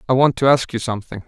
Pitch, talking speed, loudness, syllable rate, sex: 125 Hz, 280 wpm, -18 LUFS, 7.3 syllables/s, male